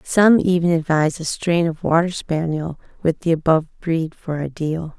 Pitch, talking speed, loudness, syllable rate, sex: 165 Hz, 170 wpm, -19 LUFS, 4.9 syllables/s, female